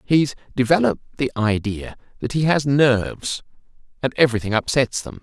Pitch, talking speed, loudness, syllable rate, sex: 125 Hz, 140 wpm, -20 LUFS, 5.4 syllables/s, male